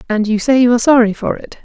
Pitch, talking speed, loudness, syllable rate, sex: 235 Hz, 295 wpm, -13 LUFS, 7.0 syllables/s, female